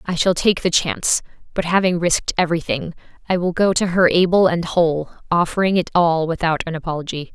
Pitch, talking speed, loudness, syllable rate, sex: 170 Hz, 190 wpm, -18 LUFS, 5.9 syllables/s, female